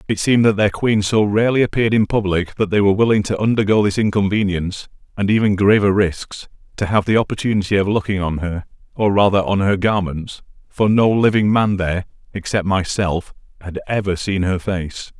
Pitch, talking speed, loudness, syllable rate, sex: 100 Hz, 185 wpm, -17 LUFS, 5.7 syllables/s, male